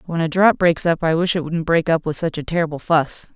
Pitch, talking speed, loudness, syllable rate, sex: 165 Hz, 285 wpm, -19 LUFS, 5.7 syllables/s, female